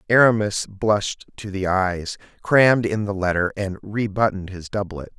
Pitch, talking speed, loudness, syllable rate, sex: 100 Hz, 160 wpm, -21 LUFS, 4.9 syllables/s, male